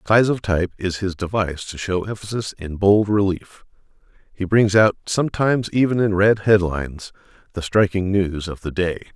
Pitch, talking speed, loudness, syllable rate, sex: 95 Hz, 170 wpm, -20 LUFS, 5.2 syllables/s, male